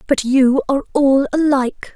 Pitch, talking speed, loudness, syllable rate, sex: 270 Hz, 155 wpm, -16 LUFS, 5.1 syllables/s, female